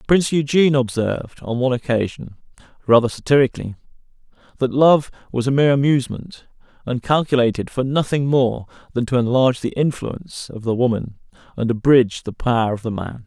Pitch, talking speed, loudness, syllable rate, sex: 130 Hz, 155 wpm, -19 LUFS, 6.0 syllables/s, male